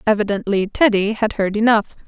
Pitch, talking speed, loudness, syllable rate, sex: 210 Hz, 145 wpm, -18 LUFS, 5.4 syllables/s, female